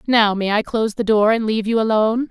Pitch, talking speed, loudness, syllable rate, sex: 220 Hz, 260 wpm, -18 LUFS, 6.5 syllables/s, female